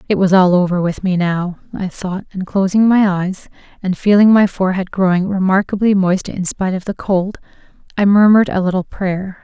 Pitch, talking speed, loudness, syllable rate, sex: 190 Hz, 190 wpm, -15 LUFS, 5.2 syllables/s, female